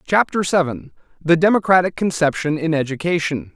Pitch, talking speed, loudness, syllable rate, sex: 165 Hz, 120 wpm, -18 LUFS, 5.5 syllables/s, male